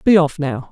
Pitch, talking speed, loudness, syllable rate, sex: 155 Hz, 250 wpm, -17 LUFS, 4.9 syllables/s, male